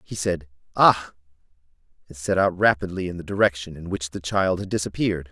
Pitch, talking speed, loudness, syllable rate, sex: 90 Hz, 180 wpm, -23 LUFS, 5.7 syllables/s, male